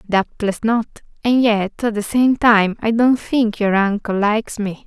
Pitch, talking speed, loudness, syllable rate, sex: 220 Hz, 185 wpm, -17 LUFS, 4.1 syllables/s, female